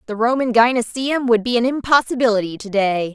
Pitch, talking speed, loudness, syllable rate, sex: 235 Hz, 170 wpm, -18 LUFS, 5.7 syllables/s, female